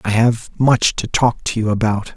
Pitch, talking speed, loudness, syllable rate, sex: 115 Hz, 220 wpm, -17 LUFS, 4.6 syllables/s, male